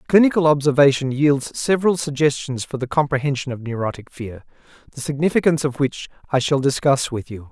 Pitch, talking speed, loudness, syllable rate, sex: 140 Hz, 160 wpm, -19 LUFS, 5.9 syllables/s, male